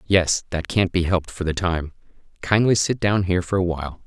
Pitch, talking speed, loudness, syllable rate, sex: 90 Hz, 220 wpm, -21 LUFS, 5.6 syllables/s, male